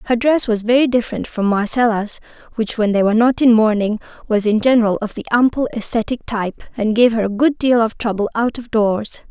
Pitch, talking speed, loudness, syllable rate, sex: 225 Hz, 215 wpm, -17 LUFS, 5.6 syllables/s, female